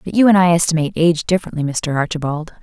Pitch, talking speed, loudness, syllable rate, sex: 165 Hz, 205 wpm, -16 LUFS, 7.4 syllables/s, female